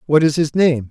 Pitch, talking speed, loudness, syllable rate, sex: 150 Hz, 265 wpm, -16 LUFS, 5.2 syllables/s, male